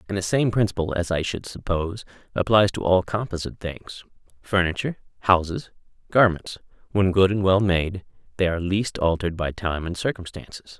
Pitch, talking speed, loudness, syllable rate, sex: 95 Hz, 155 wpm, -23 LUFS, 5.6 syllables/s, male